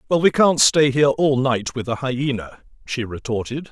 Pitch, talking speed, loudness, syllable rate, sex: 130 Hz, 195 wpm, -19 LUFS, 4.9 syllables/s, male